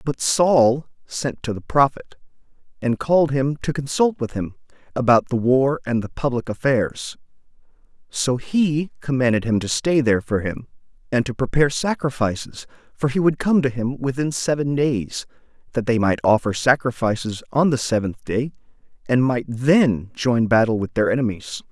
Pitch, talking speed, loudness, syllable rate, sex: 130 Hz, 165 wpm, -20 LUFS, 4.8 syllables/s, male